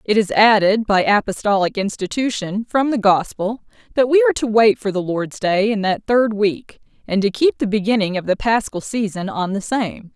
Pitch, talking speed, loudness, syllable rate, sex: 210 Hz, 200 wpm, -18 LUFS, 5.1 syllables/s, female